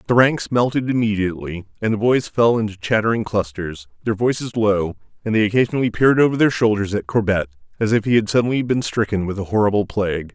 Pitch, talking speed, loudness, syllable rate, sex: 105 Hz, 195 wpm, -19 LUFS, 6.3 syllables/s, male